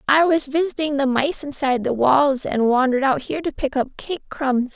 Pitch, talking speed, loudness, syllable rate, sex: 275 Hz, 215 wpm, -20 LUFS, 5.2 syllables/s, female